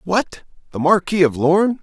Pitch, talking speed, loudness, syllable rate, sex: 180 Hz, 165 wpm, -17 LUFS, 5.6 syllables/s, male